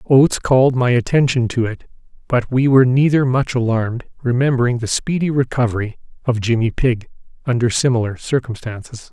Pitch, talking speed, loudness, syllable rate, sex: 125 Hz, 145 wpm, -17 LUFS, 5.7 syllables/s, male